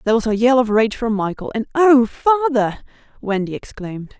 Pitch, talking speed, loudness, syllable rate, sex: 235 Hz, 185 wpm, -17 LUFS, 5.4 syllables/s, female